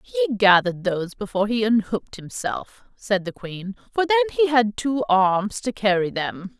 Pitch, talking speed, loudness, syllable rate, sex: 215 Hz, 175 wpm, -22 LUFS, 5.1 syllables/s, female